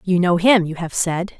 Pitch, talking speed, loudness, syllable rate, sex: 180 Hz, 260 wpm, -18 LUFS, 4.8 syllables/s, female